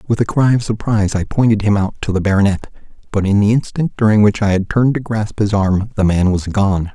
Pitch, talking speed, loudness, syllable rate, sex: 105 Hz, 250 wpm, -15 LUFS, 5.9 syllables/s, male